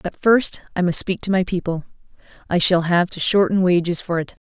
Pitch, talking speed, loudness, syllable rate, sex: 180 Hz, 215 wpm, -19 LUFS, 5.6 syllables/s, female